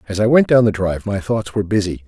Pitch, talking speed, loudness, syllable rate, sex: 105 Hz, 290 wpm, -17 LUFS, 6.9 syllables/s, male